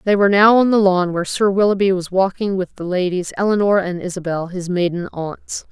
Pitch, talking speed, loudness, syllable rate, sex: 190 Hz, 210 wpm, -17 LUFS, 5.6 syllables/s, female